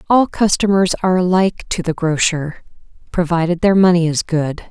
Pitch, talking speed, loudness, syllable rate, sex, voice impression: 175 Hz, 155 wpm, -16 LUFS, 5.3 syllables/s, female, very feminine, very adult-like, slightly middle-aged, very thin, relaxed, weak, dark, very soft, muffled, very fluent, slightly raspy, very cute, very intellectual, very refreshing, sincere, very calm, very friendly, very reassuring, very unique, very elegant, slightly wild, very sweet, slightly lively, very kind, very modest, light